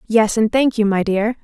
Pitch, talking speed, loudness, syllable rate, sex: 220 Hz, 250 wpm, -17 LUFS, 4.8 syllables/s, female